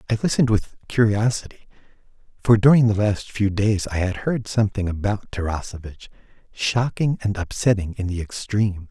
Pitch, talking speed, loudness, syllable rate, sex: 105 Hz, 135 wpm, -21 LUFS, 5.4 syllables/s, male